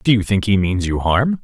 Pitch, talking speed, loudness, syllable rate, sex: 105 Hz, 290 wpm, -17 LUFS, 5.0 syllables/s, male